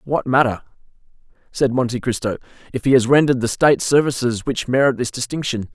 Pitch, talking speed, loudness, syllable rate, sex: 125 Hz, 165 wpm, -18 LUFS, 6.2 syllables/s, male